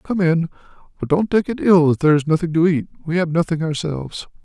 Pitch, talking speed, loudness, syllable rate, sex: 160 Hz, 230 wpm, -18 LUFS, 6.3 syllables/s, male